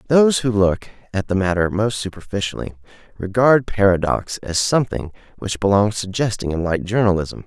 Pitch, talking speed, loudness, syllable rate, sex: 105 Hz, 155 wpm, -19 LUFS, 5.4 syllables/s, male